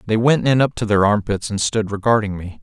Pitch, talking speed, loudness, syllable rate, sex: 110 Hz, 250 wpm, -18 LUFS, 5.5 syllables/s, male